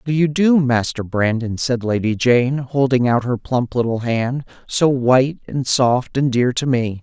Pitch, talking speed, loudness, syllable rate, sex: 125 Hz, 195 wpm, -18 LUFS, 4.5 syllables/s, male